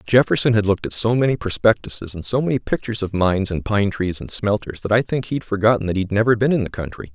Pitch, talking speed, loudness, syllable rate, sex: 105 Hz, 250 wpm, -20 LUFS, 6.5 syllables/s, male